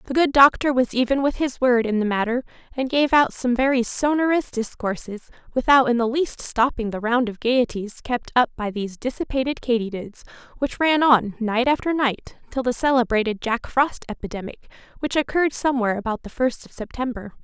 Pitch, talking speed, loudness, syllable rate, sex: 245 Hz, 185 wpm, -21 LUFS, 5.4 syllables/s, female